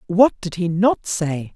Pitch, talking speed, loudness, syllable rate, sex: 185 Hz, 195 wpm, -19 LUFS, 3.7 syllables/s, female